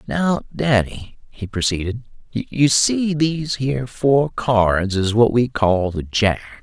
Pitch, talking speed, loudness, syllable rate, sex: 120 Hz, 145 wpm, -19 LUFS, 3.6 syllables/s, male